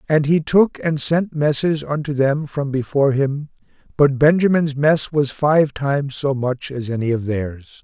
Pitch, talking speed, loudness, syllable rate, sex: 140 Hz, 175 wpm, -18 LUFS, 4.3 syllables/s, male